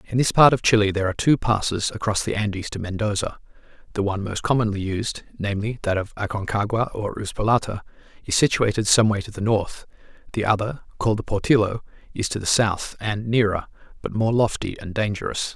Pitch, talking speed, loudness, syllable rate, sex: 105 Hz, 180 wpm, -22 LUFS, 6.0 syllables/s, male